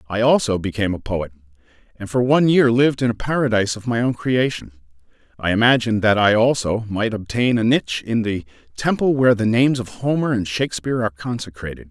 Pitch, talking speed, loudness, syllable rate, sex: 115 Hz, 190 wpm, -19 LUFS, 6.3 syllables/s, male